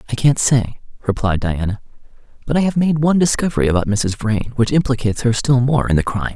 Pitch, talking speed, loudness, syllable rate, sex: 120 Hz, 210 wpm, -17 LUFS, 6.4 syllables/s, male